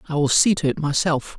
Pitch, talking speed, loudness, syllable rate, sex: 150 Hz, 260 wpm, -19 LUFS, 5.8 syllables/s, male